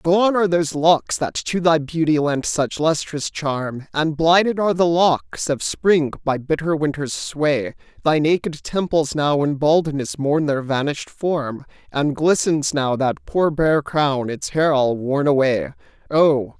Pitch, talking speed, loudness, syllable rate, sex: 150 Hz, 165 wpm, -19 LUFS, 4.0 syllables/s, male